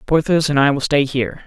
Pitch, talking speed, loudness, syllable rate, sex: 140 Hz, 245 wpm, -17 LUFS, 6.0 syllables/s, male